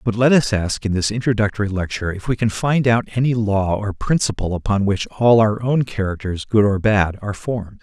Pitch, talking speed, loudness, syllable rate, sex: 105 Hz, 215 wpm, -19 LUFS, 5.5 syllables/s, male